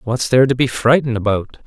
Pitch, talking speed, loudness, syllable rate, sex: 120 Hz, 215 wpm, -16 LUFS, 6.5 syllables/s, male